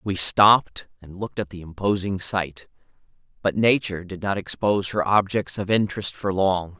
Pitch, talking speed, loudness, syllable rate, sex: 95 Hz, 170 wpm, -22 LUFS, 5.1 syllables/s, male